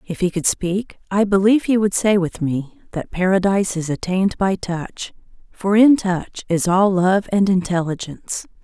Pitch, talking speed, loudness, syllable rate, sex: 190 Hz, 175 wpm, -19 LUFS, 4.7 syllables/s, female